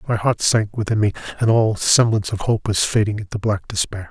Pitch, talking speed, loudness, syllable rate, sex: 105 Hz, 220 wpm, -19 LUFS, 5.7 syllables/s, male